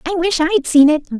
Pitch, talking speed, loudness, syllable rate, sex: 325 Hz, 300 wpm, -14 LUFS, 6.4 syllables/s, female